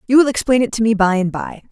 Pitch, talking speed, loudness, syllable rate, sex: 220 Hz, 315 wpm, -16 LUFS, 6.8 syllables/s, female